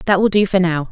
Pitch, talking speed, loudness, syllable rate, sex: 185 Hz, 330 wpm, -15 LUFS, 6.5 syllables/s, female